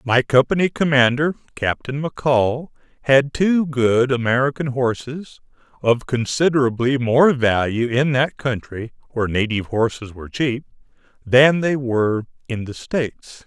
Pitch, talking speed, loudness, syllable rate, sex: 130 Hz, 125 wpm, -19 LUFS, 4.6 syllables/s, male